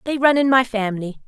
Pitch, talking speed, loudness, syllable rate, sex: 240 Hz, 235 wpm, -18 LUFS, 6.6 syllables/s, female